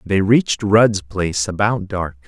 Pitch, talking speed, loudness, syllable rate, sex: 100 Hz, 160 wpm, -17 LUFS, 4.3 syllables/s, male